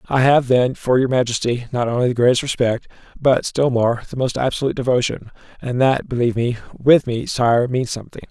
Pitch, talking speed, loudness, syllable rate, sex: 125 Hz, 195 wpm, -18 LUFS, 5.7 syllables/s, male